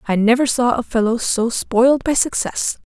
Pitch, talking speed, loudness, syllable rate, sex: 240 Hz, 190 wpm, -17 LUFS, 4.9 syllables/s, female